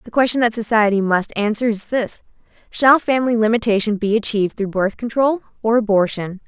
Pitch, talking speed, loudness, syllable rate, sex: 220 Hz, 165 wpm, -18 LUFS, 5.7 syllables/s, female